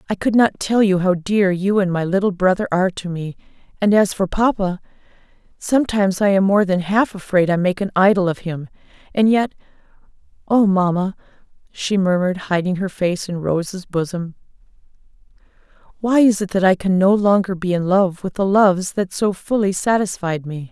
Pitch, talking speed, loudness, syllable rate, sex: 190 Hz, 175 wpm, -18 LUFS, 5.3 syllables/s, female